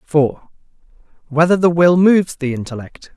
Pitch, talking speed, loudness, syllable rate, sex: 160 Hz, 135 wpm, -15 LUFS, 6.3 syllables/s, male